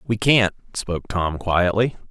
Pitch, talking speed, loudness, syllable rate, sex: 100 Hz, 145 wpm, -21 LUFS, 4.3 syllables/s, male